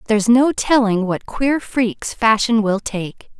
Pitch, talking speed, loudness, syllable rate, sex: 225 Hz, 160 wpm, -17 LUFS, 3.9 syllables/s, female